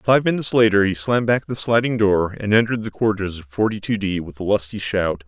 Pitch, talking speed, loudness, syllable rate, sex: 105 Hz, 240 wpm, -20 LUFS, 5.9 syllables/s, male